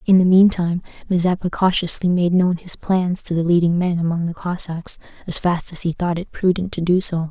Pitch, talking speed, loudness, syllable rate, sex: 175 Hz, 220 wpm, -19 LUFS, 5.3 syllables/s, female